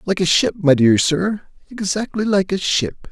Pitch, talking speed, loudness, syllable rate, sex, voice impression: 180 Hz, 175 wpm, -17 LUFS, 4.4 syllables/s, male, very masculine, very adult-like, very middle-aged, very thick, tensed, slightly weak, slightly bright, slightly hard, clear, fluent, slightly raspy, cool, very intellectual, very sincere, very calm, very mature, friendly, very reassuring, unique, elegant, wild, slightly sweet, slightly lively, very kind, slightly modest